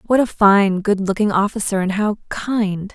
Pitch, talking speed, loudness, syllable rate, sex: 205 Hz, 185 wpm, -18 LUFS, 4.3 syllables/s, female